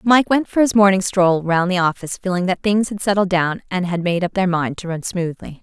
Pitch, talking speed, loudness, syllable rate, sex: 185 Hz, 255 wpm, -18 LUFS, 5.5 syllables/s, female